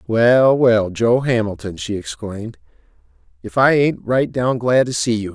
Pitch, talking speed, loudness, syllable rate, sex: 120 Hz, 170 wpm, -17 LUFS, 4.4 syllables/s, male